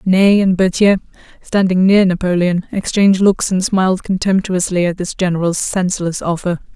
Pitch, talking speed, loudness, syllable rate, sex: 185 Hz, 140 wpm, -15 LUFS, 5.1 syllables/s, female